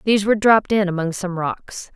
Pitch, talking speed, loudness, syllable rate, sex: 195 Hz, 215 wpm, -18 LUFS, 6.0 syllables/s, female